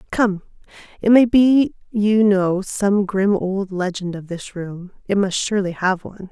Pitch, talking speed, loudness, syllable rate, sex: 195 Hz, 160 wpm, -19 LUFS, 4.2 syllables/s, female